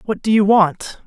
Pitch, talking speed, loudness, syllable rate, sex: 205 Hz, 225 wpm, -15 LUFS, 4.2 syllables/s, female